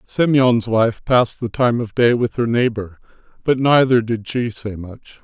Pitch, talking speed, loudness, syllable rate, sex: 115 Hz, 185 wpm, -17 LUFS, 4.3 syllables/s, male